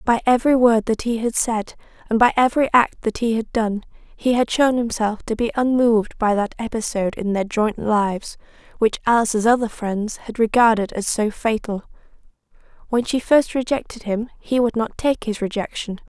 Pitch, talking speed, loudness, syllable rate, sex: 225 Hz, 180 wpm, -20 LUFS, 5.2 syllables/s, female